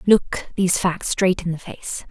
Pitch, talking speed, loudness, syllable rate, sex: 185 Hz, 200 wpm, -21 LUFS, 4.4 syllables/s, female